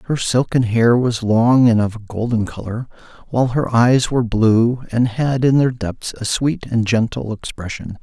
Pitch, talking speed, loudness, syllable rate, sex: 120 Hz, 185 wpm, -17 LUFS, 4.7 syllables/s, male